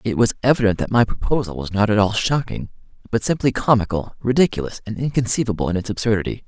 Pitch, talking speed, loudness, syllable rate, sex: 110 Hz, 185 wpm, -20 LUFS, 6.5 syllables/s, male